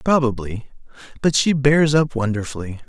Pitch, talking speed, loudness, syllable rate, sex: 130 Hz, 125 wpm, -19 LUFS, 4.9 syllables/s, male